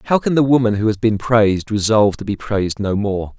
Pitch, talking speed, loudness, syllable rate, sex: 110 Hz, 250 wpm, -17 LUFS, 6.0 syllables/s, male